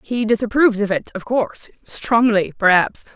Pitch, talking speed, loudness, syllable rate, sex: 215 Hz, 135 wpm, -18 LUFS, 5.1 syllables/s, female